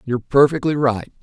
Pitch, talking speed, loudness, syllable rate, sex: 130 Hz, 145 wpm, -17 LUFS, 5.7 syllables/s, male